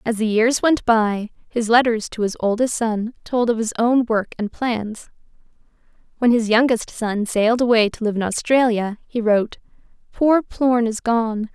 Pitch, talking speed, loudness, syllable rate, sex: 230 Hz, 175 wpm, -19 LUFS, 4.5 syllables/s, female